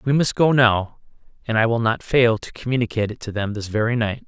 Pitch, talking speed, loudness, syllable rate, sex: 115 Hz, 240 wpm, -20 LUFS, 5.9 syllables/s, male